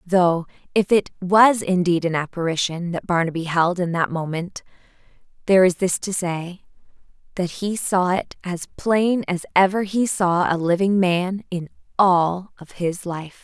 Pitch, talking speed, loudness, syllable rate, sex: 180 Hz, 160 wpm, -21 LUFS, 4.3 syllables/s, female